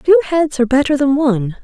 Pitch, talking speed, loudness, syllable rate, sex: 275 Hz, 220 wpm, -14 LUFS, 6.3 syllables/s, female